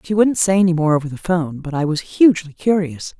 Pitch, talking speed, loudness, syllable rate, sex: 170 Hz, 245 wpm, -17 LUFS, 6.2 syllables/s, female